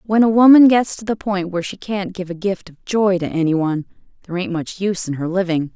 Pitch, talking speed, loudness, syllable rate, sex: 185 Hz, 250 wpm, -18 LUFS, 5.9 syllables/s, female